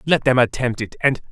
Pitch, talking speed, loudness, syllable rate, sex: 125 Hz, 230 wpm, -19 LUFS, 5.6 syllables/s, male